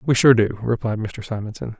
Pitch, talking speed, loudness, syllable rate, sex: 115 Hz, 200 wpm, -20 LUFS, 5.2 syllables/s, male